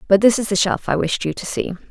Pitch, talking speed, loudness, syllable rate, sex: 190 Hz, 315 wpm, -19 LUFS, 6.3 syllables/s, female